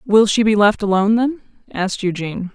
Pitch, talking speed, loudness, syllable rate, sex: 210 Hz, 190 wpm, -17 LUFS, 6.1 syllables/s, female